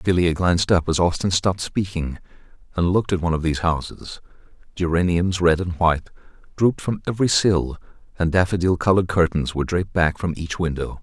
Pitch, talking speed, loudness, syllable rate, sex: 85 Hz, 175 wpm, -21 LUFS, 6.2 syllables/s, male